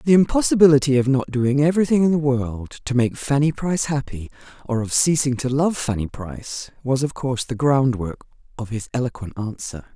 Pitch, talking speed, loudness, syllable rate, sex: 135 Hz, 180 wpm, -20 LUFS, 5.5 syllables/s, female